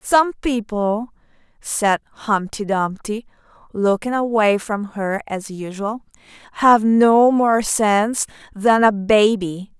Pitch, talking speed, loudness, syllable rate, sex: 215 Hz, 110 wpm, -18 LUFS, 3.5 syllables/s, female